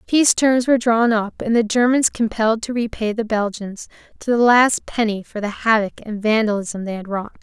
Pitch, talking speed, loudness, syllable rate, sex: 225 Hz, 200 wpm, -18 LUFS, 5.2 syllables/s, female